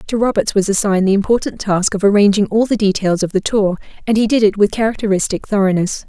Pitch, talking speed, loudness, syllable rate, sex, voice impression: 205 Hz, 215 wpm, -15 LUFS, 6.4 syllables/s, female, very feminine, slightly young, slightly adult-like, very thin, tensed, slightly powerful, bright, hard, very clear, fluent, cute, intellectual, very refreshing, sincere, calm, friendly, reassuring, slightly unique, very elegant, sweet, lively, slightly strict, slightly intense, slightly sharp, light